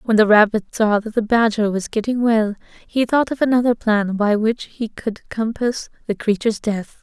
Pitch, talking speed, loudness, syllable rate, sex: 220 Hz, 195 wpm, -19 LUFS, 4.8 syllables/s, female